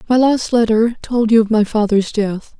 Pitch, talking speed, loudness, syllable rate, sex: 225 Hz, 210 wpm, -15 LUFS, 4.6 syllables/s, female